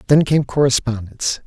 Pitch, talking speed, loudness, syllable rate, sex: 135 Hz, 125 wpm, -17 LUFS, 5.7 syllables/s, male